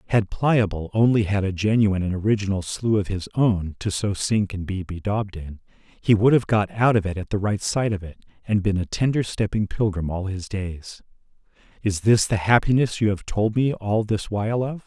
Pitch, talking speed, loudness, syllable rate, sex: 105 Hz, 210 wpm, -22 LUFS, 5.2 syllables/s, male